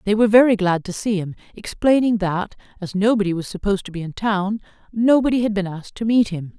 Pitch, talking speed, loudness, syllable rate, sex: 205 Hz, 220 wpm, -19 LUFS, 6.1 syllables/s, female